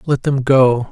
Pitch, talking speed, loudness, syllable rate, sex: 130 Hz, 195 wpm, -14 LUFS, 3.7 syllables/s, male